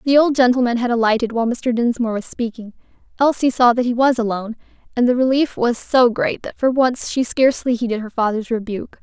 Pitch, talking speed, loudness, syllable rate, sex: 240 Hz, 205 wpm, -18 LUFS, 6.1 syllables/s, female